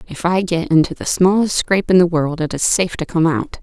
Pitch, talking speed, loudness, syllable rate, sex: 175 Hz, 265 wpm, -16 LUFS, 5.8 syllables/s, female